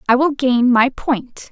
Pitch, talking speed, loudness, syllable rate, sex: 255 Hz, 200 wpm, -16 LUFS, 3.8 syllables/s, female